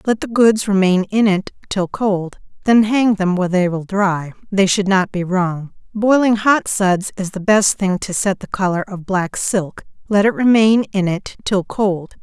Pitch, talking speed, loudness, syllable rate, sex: 195 Hz, 195 wpm, -17 LUFS, 4.1 syllables/s, female